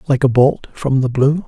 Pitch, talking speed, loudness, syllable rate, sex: 135 Hz, 245 wpm, -15 LUFS, 4.7 syllables/s, male